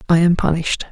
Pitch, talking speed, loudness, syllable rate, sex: 170 Hz, 195 wpm, -17 LUFS, 7.1 syllables/s, female